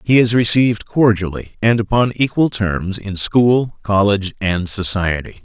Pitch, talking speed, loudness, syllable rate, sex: 105 Hz, 145 wpm, -16 LUFS, 4.6 syllables/s, male